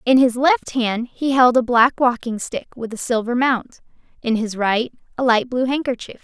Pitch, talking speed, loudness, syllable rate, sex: 245 Hz, 200 wpm, -19 LUFS, 4.7 syllables/s, female